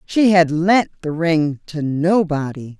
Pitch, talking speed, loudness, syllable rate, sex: 165 Hz, 150 wpm, -17 LUFS, 3.6 syllables/s, female